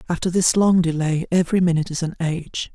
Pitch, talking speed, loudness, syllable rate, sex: 170 Hz, 195 wpm, -20 LUFS, 6.5 syllables/s, male